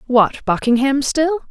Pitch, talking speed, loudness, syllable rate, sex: 265 Hz, 120 wpm, -17 LUFS, 3.9 syllables/s, female